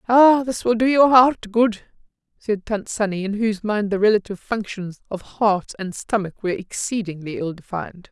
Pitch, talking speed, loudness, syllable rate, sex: 210 Hz, 175 wpm, -20 LUFS, 5.1 syllables/s, female